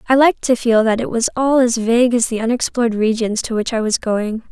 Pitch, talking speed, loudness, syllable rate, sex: 235 Hz, 255 wpm, -16 LUFS, 5.9 syllables/s, female